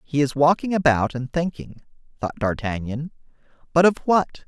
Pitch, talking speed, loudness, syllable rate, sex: 145 Hz, 150 wpm, -22 LUFS, 5.3 syllables/s, male